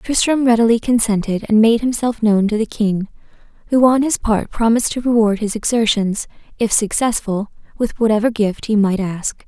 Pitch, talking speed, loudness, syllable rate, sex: 220 Hz, 170 wpm, -17 LUFS, 5.1 syllables/s, female